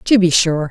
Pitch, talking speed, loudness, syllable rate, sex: 175 Hz, 255 wpm, -13 LUFS, 4.5 syllables/s, female